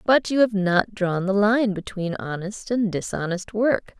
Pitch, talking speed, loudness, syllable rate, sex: 200 Hz, 180 wpm, -23 LUFS, 4.2 syllables/s, female